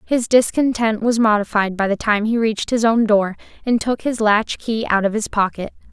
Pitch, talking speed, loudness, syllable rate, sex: 220 Hz, 215 wpm, -18 LUFS, 5.1 syllables/s, female